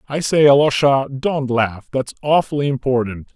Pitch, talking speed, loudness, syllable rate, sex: 135 Hz, 145 wpm, -17 LUFS, 4.7 syllables/s, male